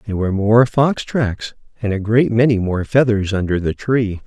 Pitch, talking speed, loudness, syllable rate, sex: 110 Hz, 195 wpm, -17 LUFS, 5.0 syllables/s, male